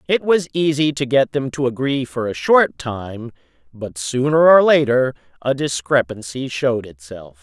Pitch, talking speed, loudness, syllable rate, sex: 135 Hz, 160 wpm, -18 LUFS, 4.4 syllables/s, male